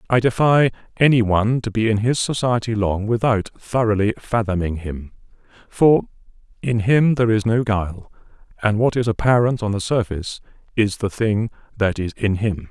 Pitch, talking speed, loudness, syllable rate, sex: 110 Hz, 165 wpm, -19 LUFS, 5.1 syllables/s, male